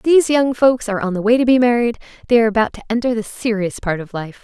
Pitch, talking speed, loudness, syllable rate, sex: 230 Hz, 270 wpm, -17 LUFS, 6.8 syllables/s, female